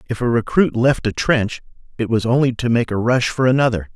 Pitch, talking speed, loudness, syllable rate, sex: 120 Hz, 230 wpm, -18 LUFS, 5.6 syllables/s, male